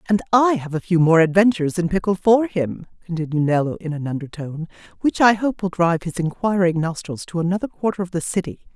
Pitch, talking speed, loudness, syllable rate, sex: 180 Hz, 205 wpm, -20 LUFS, 6.2 syllables/s, female